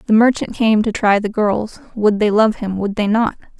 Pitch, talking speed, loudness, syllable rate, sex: 215 Hz, 235 wpm, -16 LUFS, 4.8 syllables/s, female